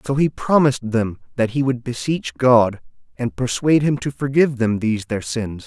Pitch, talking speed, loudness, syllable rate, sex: 120 Hz, 190 wpm, -19 LUFS, 5.1 syllables/s, male